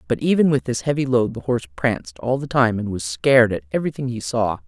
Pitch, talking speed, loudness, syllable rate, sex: 115 Hz, 245 wpm, -20 LUFS, 6.3 syllables/s, female